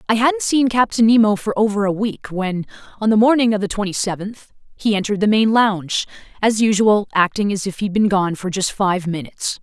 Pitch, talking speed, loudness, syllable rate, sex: 205 Hz, 210 wpm, -18 LUFS, 5.6 syllables/s, female